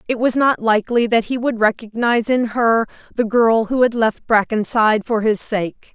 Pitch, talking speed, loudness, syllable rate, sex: 225 Hz, 190 wpm, -17 LUFS, 5.0 syllables/s, female